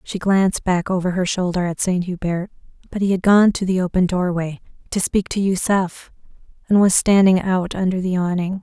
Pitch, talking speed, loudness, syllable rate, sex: 185 Hz, 195 wpm, -19 LUFS, 5.2 syllables/s, female